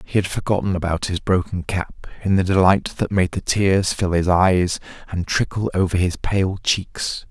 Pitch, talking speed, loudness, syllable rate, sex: 90 Hz, 190 wpm, -20 LUFS, 4.6 syllables/s, male